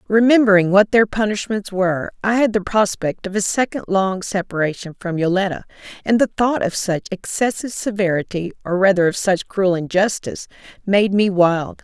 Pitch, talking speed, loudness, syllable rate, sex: 195 Hz, 160 wpm, -18 LUFS, 5.3 syllables/s, female